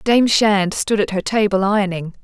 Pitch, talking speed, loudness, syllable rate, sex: 200 Hz, 190 wpm, -17 LUFS, 4.7 syllables/s, female